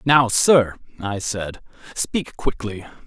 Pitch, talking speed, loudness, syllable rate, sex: 115 Hz, 115 wpm, -21 LUFS, 3.2 syllables/s, male